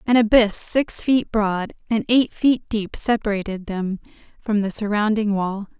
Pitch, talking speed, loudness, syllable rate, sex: 215 Hz, 155 wpm, -20 LUFS, 4.5 syllables/s, female